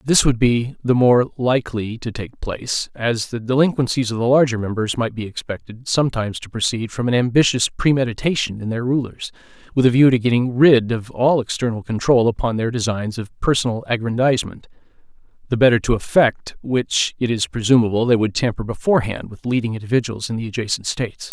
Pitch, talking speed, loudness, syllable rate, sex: 120 Hz, 180 wpm, -19 LUFS, 5.7 syllables/s, male